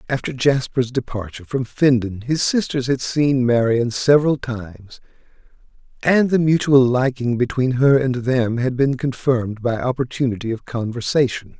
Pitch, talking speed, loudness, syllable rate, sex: 125 Hz, 140 wpm, -19 LUFS, 4.8 syllables/s, male